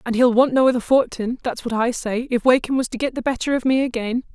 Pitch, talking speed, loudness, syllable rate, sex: 245 Hz, 265 wpm, -20 LUFS, 6.2 syllables/s, female